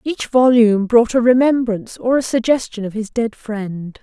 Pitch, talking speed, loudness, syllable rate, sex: 230 Hz, 180 wpm, -16 LUFS, 4.9 syllables/s, female